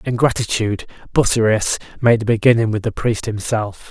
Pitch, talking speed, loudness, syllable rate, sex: 110 Hz, 155 wpm, -18 LUFS, 5.4 syllables/s, male